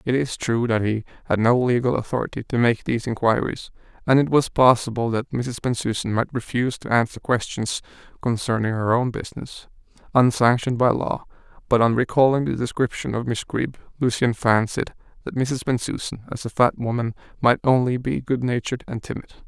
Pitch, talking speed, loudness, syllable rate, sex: 120 Hz, 170 wpm, -22 LUFS, 5.5 syllables/s, male